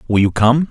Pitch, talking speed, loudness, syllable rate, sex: 115 Hz, 255 wpm, -14 LUFS, 5.5 syllables/s, male